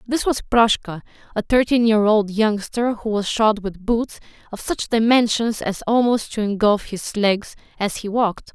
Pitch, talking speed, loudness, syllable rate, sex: 220 Hz, 170 wpm, -20 LUFS, 4.5 syllables/s, female